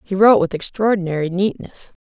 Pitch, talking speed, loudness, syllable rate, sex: 190 Hz, 145 wpm, -17 LUFS, 6.0 syllables/s, female